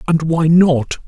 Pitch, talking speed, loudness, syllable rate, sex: 160 Hz, 170 wpm, -14 LUFS, 3.5 syllables/s, male